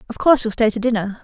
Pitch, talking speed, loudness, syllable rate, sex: 230 Hz, 290 wpm, -17 LUFS, 7.8 syllables/s, female